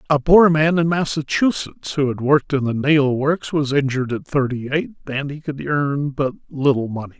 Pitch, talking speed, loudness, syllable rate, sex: 140 Hz, 200 wpm, -19 LUFS, 5.0 syllables/s, male